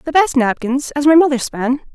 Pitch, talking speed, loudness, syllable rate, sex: 275 Hz, 215 wpm, -15 LUFS, 5.2 syllables/s, female